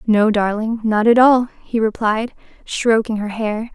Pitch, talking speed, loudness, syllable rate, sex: 220 Hz, 160 wpm, -17 LUFS, 4.1 syllables/s, female